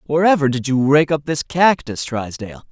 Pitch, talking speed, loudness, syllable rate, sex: 140 Hz, 175 wpm, -17 LUFS, 5.0 syllables/s, male